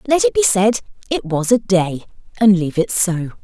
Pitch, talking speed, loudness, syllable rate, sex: 210 Hz, 210 wpm, -17 LUFS, 5.0 syllables/s, female